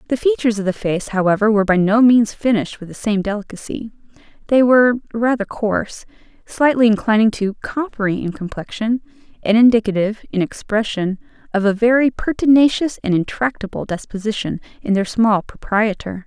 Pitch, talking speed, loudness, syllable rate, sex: 220 Hz, 150 wpm, -17 LUFS, 5.6 syllables/s, female